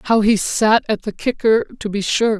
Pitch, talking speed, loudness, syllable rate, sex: 215 Hz, 200 wpm, -17 LUFS, 4.3 syllables/s, female